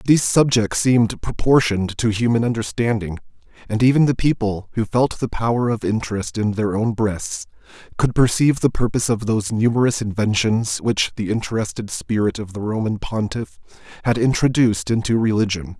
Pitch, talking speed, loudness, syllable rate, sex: 115 Hz, 155 wpm, -19 LUFS, 5.5 syllables/s, male